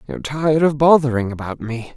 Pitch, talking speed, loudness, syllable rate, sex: 135 Hz, 185 wpm, -18 LUFS, 6.2 syllables/s, male